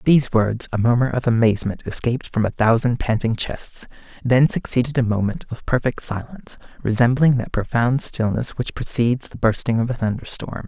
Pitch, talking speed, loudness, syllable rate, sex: 120 Hz, 175 wpm, -20 LUFS, 5.5 syllables/s, male